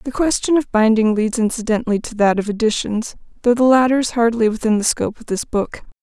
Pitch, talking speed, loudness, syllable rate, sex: 230 Hz, 210 wpm, -17 LUFS, 6.1 syllables/s, female